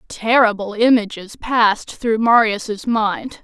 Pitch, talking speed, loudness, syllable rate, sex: 220 Hz, 105 wpm, -17 LUFS, 3.7 syllables/s, female